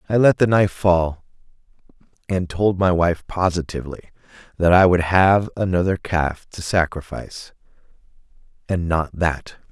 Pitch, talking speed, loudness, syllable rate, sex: 90 Hz, 130 wpm, -19 LUFS, 4.6 syllables/s, male